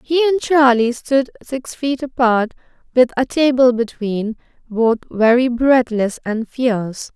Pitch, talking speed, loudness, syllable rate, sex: 245 Hz, 135 wpm, -17 LUFS, 3.9 syllables/s, female